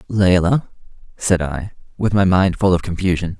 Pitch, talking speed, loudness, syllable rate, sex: 90 Hz, 160 wpm, -18 LUFS, 4.8 syllables/s, male